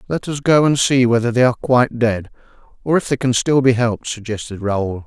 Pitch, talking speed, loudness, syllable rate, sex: 120 Hz, 225 wpm, -17 LUFS, 5.7 syllables/s, male